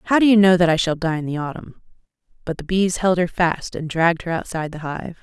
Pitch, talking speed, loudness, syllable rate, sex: 170 Hz, 265 wpm, -20 LUFS, 6.2 syllables/s, female